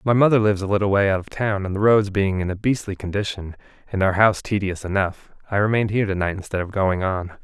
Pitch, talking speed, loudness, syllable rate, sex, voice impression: 100 Hz, 240 wpm, -21 LUFS, 6.5 syllables/s, male, very masculine, very middle-aged, very thick, tensed, slightly powerful, slightly bright, hard, slightly muffled, fluent, slightly raspy, cool, very intellectual, very refreshing, sincere, calm, mature, very friendly, very reassuring, unique, slightly elegant, wild, sweet, slightly lively, kind, slightly modest